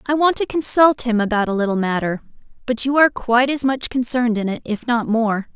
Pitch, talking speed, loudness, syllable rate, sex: 240 Hz, 225 wpm, -18 LUFS, 5.9 syllables/s, female